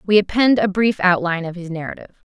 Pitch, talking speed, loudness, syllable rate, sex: 190 Hz, 210 wpm, -18 LUFS, 6.7 syllables/s, female